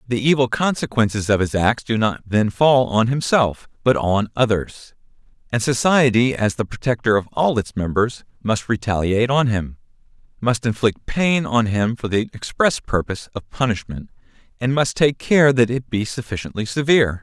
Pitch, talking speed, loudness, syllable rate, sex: 115 Hz, 165 wpm, -19 LUFS, 4.9 syllables/s, male